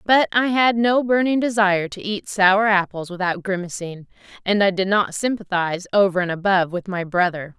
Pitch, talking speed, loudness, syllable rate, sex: 195 Hz, 180 wpm, -20 LUFS, 5.3 syllables/s, female